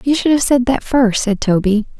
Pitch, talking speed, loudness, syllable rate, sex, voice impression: 240 Hz, 240 wpm, -15 LUFS, 5.1 syllables/s, female, feminine, adult-like, relaxed, weak, slightly dark, soft, calm, friendly, reassuring, elegant, kind, modest